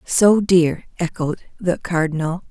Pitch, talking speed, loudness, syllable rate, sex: 170 Hz, 120 wpm, -19 LUFS, 4.0 syllables/s, female